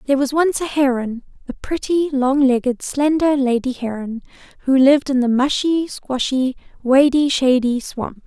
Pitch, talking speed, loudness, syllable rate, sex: 270 Hz, 150 wpm, -18 LUFS, 4.7 syllables/s, female